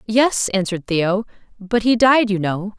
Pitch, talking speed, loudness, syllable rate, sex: 210 Hz, 170 wpm, -18 LUFS, 4.4 syllables/s, female